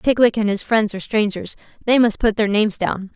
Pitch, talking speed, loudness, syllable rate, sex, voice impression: 215 Hz, 230 wpm, -18 LUFS, 5.9 syllables/s, female, feminine, adult-like, tensed, bright, clear, fluent, friendly, lively, light